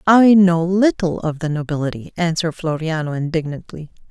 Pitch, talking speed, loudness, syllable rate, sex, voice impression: 165 Hz, 130 wpm, -18 LUFS, 5.3 syllables/s, female, very feminine, very middle-aged, slightly thin, slightly relaxed, powerful, slightly dark, soft, clear, fluent, slightly cool, very intellectual, slightly refreshing, very sincere, very calm, friendly, reassuring, slightly unique, very elegant, slightly wild, sweet, lively, very kind, slightly modest, slightly light